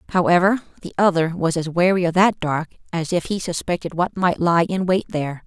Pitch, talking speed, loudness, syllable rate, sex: 175 Hz, 210 wpm, -20 LUFS, 5.7 syllables/s, female